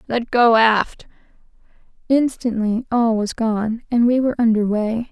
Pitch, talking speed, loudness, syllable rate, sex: 230 Hz, 140 wpm, -18 LUFS, 4.2 syllables/s, female